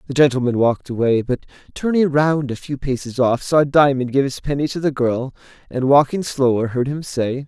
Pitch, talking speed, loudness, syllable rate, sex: 135 Hz, 200 wpm, -18 LUFS, 5.3 syllables/s, male